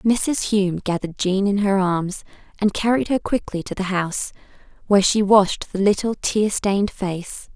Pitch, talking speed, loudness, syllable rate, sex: 200 Hz, 175 wpm, -20 LUFS, 4.6 syllables/s, female